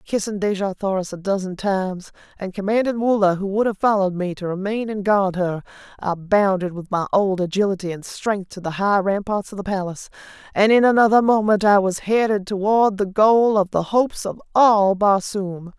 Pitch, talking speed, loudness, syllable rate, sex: 200 Hz, 190 wpm, -20 LUFS, 5.2 syllables/s, female